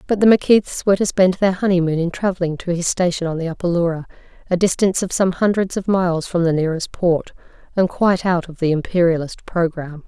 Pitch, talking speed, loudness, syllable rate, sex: 175 Hz, 210 wpm, -18 LUFS, 6.3 syllables/s, female